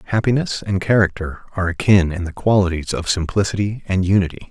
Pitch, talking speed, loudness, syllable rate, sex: 95 Hz, 160 wpm, -19 LUFS, 6.2 syllables/s, male